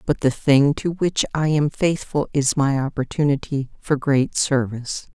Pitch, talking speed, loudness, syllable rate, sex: 140 Hz, 165 wpm, -21 LUFS, 4.4 syllables/s, female